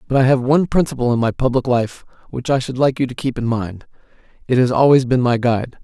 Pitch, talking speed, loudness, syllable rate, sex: 125 Hz, 245 wpm, -17 LUFS, 6.3 syllables/s, male